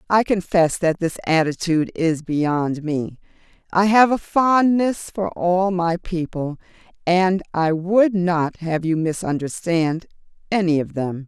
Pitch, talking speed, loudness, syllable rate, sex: 175 Hz, 140 wpm, -20 LUFS, 3.8 syllables/s, female